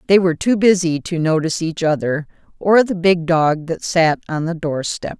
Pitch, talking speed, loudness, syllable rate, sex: 170 Hz, 210 wpm, -17 LUFS, 5.0 syllables/s, female